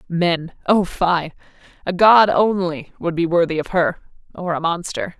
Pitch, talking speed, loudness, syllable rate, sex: 175 Hz, 160 wpm, -18 LUFS, 4.5 syllables/s, female